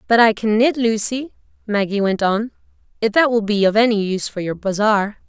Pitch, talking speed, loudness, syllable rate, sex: 215 Hz, 205 wpm, -18 LUFS, 5.5 syllables/s, female